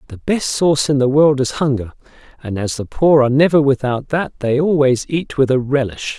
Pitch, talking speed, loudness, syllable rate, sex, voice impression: 135 Hz, 215 wpm, -16 LUFS, 5.3 syllables/s, male, very masculine, very adult-like, old, very thick, tensed, powerful, bright, slightly soft, slightly clear, slightly fluent, slightly raspy, very cool, very intellectual, very sincere, very calm, friendly, very reassuring, slightly elegant, wild, slightly sweet, lively, kind